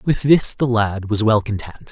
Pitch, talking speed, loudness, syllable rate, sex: 110 Hz, 220 wpm, -17 LUFS, 4.3 syllables/s, male